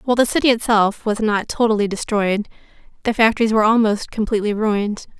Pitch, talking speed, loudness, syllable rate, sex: 215 Hz, 160 wpm, -18 LUFS, 6.4 syllables/s, female